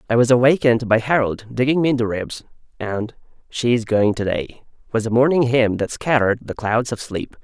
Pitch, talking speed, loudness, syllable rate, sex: 120 Hz, 200 wpm, -19 LUFS, 5.3 syllables/s, male